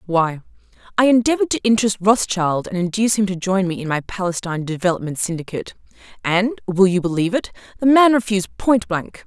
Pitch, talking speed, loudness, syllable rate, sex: 200 Hz, 175 wpm, -19 LUFS, 6.2 syllables/s, female